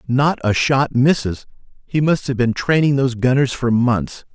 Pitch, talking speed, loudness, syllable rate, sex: 130 Hz, 180 wpm, -17 LUFS, 4.5 syllables/s, male